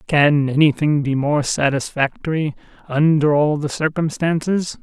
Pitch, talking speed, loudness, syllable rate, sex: 150 Hz, 110 wpm, -18 LUFS, 4.4 syllables/s, female